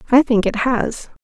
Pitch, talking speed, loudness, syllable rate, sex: 235 Hz, 195 wpm, -17 LUFS, 4.5 syllables/s, female